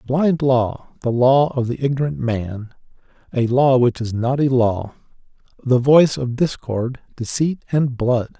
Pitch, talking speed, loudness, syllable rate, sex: 125 Hz, 155 wpm, -19 LUFS, 4.0 syllables/s, male